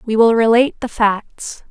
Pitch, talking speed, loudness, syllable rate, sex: 230 Hz, 175 wpm, -15 LUFS, 4.6 syllables/s, female